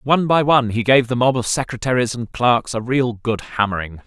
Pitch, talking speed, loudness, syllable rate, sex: 120 Hz, 220 wpm, -18 LUFS, 5.5 syllables/s, male